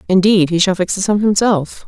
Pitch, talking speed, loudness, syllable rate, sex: 190 Hz, 225 wpm, -14 LUFS, 5.3 syllables/s, female